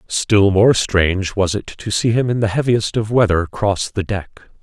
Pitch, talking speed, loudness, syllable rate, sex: 105 Hz, 210 wpm, -17 LUFS, 4.3 syllables/s, male